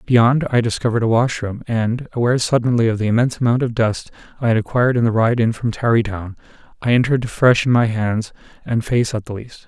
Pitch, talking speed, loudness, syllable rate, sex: 115 Hz, 210 wpm, -18 LUFS, 6.2 syllables/s, male